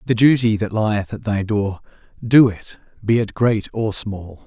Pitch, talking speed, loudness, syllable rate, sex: 110 Hz, 190 wpm, -19 LUFS, 4.1 syllables/s, male